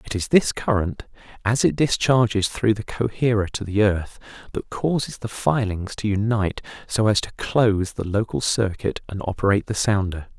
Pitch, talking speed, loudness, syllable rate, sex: 105 Hz, 175 wpm, -22 LUFS, 5.0 syllables/s, male